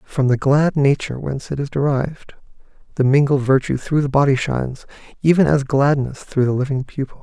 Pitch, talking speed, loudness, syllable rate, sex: 135 Hz, 185 wpm, -18 LUFS, 5.7 syllables/s, male